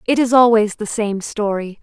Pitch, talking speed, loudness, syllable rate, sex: 220 Hz, 195 wpm, -16 LUFS, 4.8 syllables/s, female